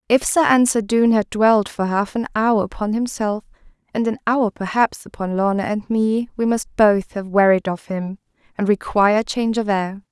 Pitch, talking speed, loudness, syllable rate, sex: 215 Hz, 190 wpm, -19 LUFS, 5.0 syllables/s, female